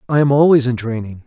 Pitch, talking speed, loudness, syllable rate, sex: 130 Hz, 235 wpm, -15 LUFS, 6.5 syllables/s, male